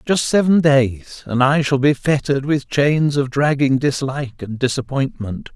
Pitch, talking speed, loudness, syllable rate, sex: 135 Hz, 160 wpm, -18 LUFS, 4.5 syllables/s, male